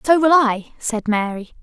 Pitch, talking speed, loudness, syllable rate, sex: 245 Hz, 185 wpm, -18 LUFS, 4.4 syllables/s, female